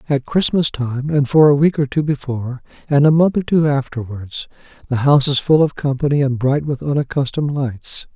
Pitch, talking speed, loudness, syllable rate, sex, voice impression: 140 Hz, 200 wpm, -17 LUFS, 5.4 syllables/s, male, masculine, middle-aged, slightly relaxed, weak, slightly dark, soft, raspy, calm, friendly, wild, kind, modest